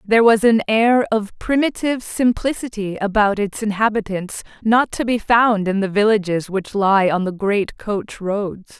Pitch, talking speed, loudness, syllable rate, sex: 210 Hz, 165 wpm, -18 LUFS, 4.5 syllables/s, female